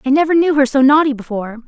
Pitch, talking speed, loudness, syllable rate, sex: 275 Hz, 250 wpm, -14 LUFS, 7.5 syllables/s, female